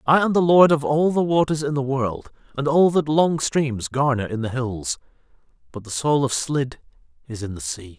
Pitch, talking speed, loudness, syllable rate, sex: 135 Hz, 220 wpm, -21 LUFS, 4.8 syllables/s, male